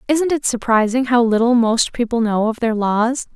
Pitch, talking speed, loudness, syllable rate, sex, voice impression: 235 Hz, 195 wpm, -17 LUFS, 4.8 syllables/s, female, slightly gender-neutral, young, slightly fluent, friendly